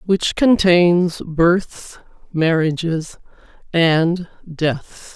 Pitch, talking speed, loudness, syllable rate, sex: 170 Hz, 70 wpm, -17 LUFS, 2.3 syllables/s, female